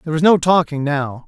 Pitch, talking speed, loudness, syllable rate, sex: 155 Hz, 235 wpm, -16 LUFS, 6.0 syllables/s, male